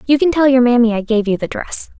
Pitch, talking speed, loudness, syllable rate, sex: 245 Hz, 300 wpm, -14 LUFS, 6.2 syllables/s, female